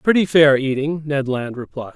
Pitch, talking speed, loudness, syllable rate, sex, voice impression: 145 Hz, 185 wpm, -18 LUFS, 4.8 syllables/s, male, masculine, middle-aged, slightly relaxed, powerful, hard, raspy, mature, wild, lively, strict, intense, sharp